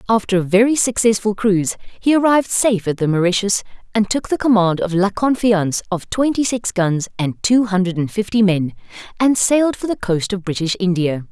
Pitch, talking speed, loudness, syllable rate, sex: 205 Hz, 190 wpm, -17 LUFS, 5.5 syllables/s, female